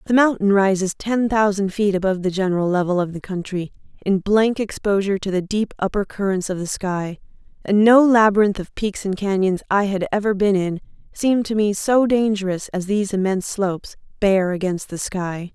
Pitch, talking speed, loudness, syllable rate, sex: 200 Hz, 190 wpm, -20 LUFS, 5.4 syllables/s, female